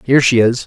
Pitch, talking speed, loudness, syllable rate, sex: 120 Hz, 270 wpm, -13 LUFS, 7.0 syllables/s, male